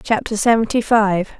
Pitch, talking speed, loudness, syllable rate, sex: 220 Hz, 130 wpm, -17 LUFS, 4.9 syllables/s, female